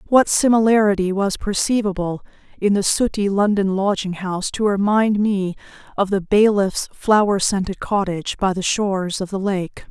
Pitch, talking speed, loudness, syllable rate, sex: 200 Hz, 150 wpm, -19 LUFS, 4.9 syllables/s, female